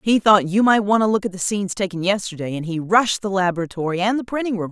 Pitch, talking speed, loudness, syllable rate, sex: 195 Hz, 265 wpm, -19 LUFS, 6.5 syllables/s, female